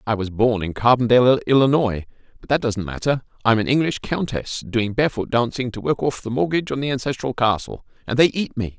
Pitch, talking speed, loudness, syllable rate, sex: 120 Hz, 200 wpm, -20 LUFS, 5.9 syllables/s, male